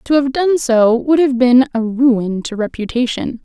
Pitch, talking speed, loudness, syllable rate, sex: 250 Hz, 190 wpm, -14 LUFS, 4.3 syllables/s, female